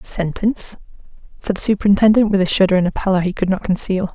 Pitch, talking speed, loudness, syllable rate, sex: 195 Hz, 200 wpm, -17 LUFS, 6.6 syllables/s, female